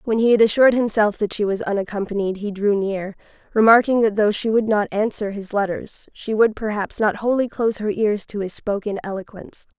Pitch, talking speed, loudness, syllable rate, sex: 210 Hz, 200 wpm, -20 LUFS, 5.6 syllables/s, female